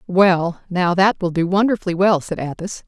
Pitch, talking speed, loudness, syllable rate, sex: 185 Hz, 190 wpm, -18 LUFS, 5.0 syllables/s, female